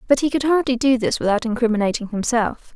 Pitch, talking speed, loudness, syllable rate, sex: 240 Hz, 195 wpm, -20 LUFS, 6.2 syllables/s, female